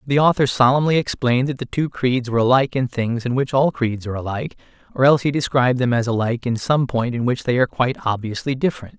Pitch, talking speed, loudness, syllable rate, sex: 125 Hz, 235 wpm, -19 LUFS, 6.8 syllables/s, male